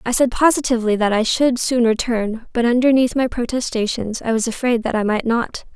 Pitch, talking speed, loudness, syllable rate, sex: 235 Hz, 200 wpm, -18 LUFS, 5.4 syllables/s, female